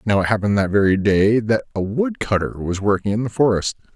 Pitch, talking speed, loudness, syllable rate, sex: 105 Hz, 210 wpm, -19 LUFS, 6.0 syllables/s, male